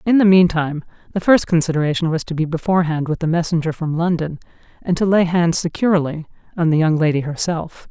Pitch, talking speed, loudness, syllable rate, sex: 165 Hz, 190 wpm, -18 LUFS, 6.2 syllables/s, female